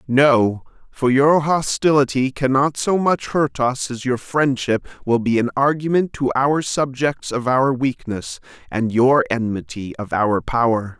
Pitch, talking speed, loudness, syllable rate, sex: 130 Hz, 155 wpm, -19 LUFS, 4.0 syllables/s, male